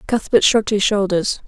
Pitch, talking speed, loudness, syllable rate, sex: 210 Hz, 165 wpm, -16 LUFS, 5.5 syllables/s, female